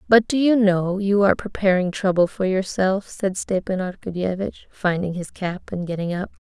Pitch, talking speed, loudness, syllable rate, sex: 190 Hz, 175 wpm, -22 LUFS, 5.0 syllables/s, female